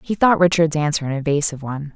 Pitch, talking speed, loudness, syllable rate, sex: 155 Hz, 215 wpm, -18 LUFS, 7.0 syllables/s, female